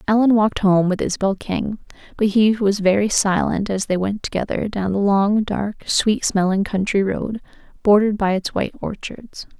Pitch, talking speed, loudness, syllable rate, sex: 205 Hz, 175 wpm, -19 LUFS, 5.0 syllables/s, female